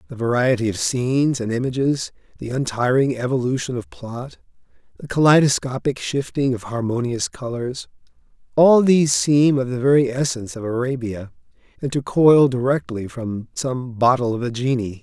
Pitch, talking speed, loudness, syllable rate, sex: 125 Hz, 145 wpm, -20 LUFS, 5.0 syllables/s, male